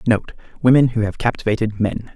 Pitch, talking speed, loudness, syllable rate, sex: 110 Hz, 165 wpm, -18 LUFS, 5.7 syllables/s, male